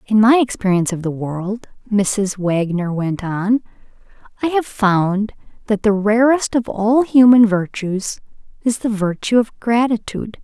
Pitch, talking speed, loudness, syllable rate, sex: 215 Hz, 145 wpm, -17 LUFS, 4.3 syllables/s, female